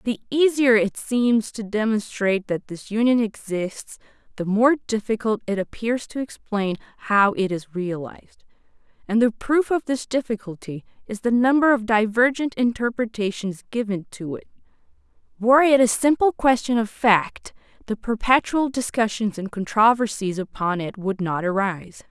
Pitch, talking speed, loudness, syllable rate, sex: 220 Hz, 145 wpm, -22 LUFS, 4.7 syllables/s, female